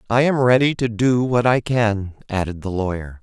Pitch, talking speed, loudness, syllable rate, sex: 115 Hz, 205 wpm, -19 LUFS, 4.8 syllables/s, male